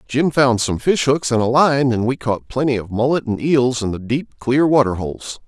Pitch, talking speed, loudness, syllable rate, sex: 125 Hz, 230 wpm, -18 LUFS, 4.9 syllables/s, male